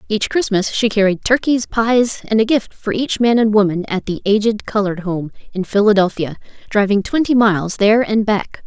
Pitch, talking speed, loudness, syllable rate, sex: 210 Hz, 185 wpm, -16 LUFS, 5.2 syllables/s, female